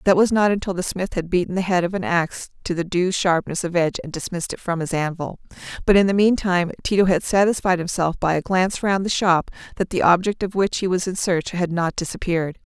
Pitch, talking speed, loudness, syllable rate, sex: 180 Hz, 240 wpm, -21 LUFS, 6.1 syllables/s, female